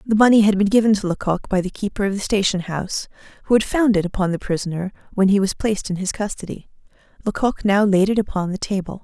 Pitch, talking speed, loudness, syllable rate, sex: 200 Hz, 235 wpm, -20 LUFS, 6.5 syllables/s, female